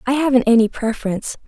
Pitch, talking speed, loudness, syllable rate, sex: 245 Hz, 160 wpm, -17 LUFS, 7.1 syllables/s, female